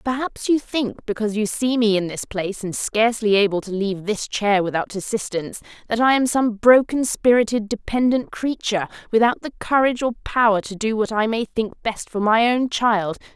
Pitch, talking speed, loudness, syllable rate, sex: 220 Hz, 195 wpm, -20 LUFS, 5.4 syllables/s, female